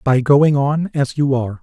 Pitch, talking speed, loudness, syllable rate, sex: 140 Hz, 220 wpm, -16 LUFS, 4.6 syllables/s, male